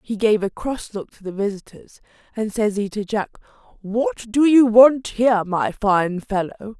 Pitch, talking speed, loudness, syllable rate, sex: 220 Hz, 185 wpm, -19 LUFS, 4.5 syllables/s, female